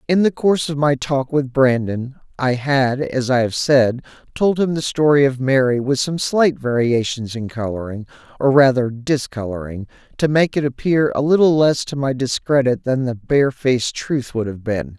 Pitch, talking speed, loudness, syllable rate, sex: 135 Hz, 185 wpm, -18 LUFS, 4.8 syllables/s, male